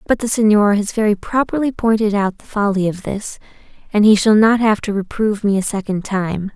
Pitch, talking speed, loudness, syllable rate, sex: 210 Hz, 210 wpm, -16 LUFS, 5.5 syllables/s, female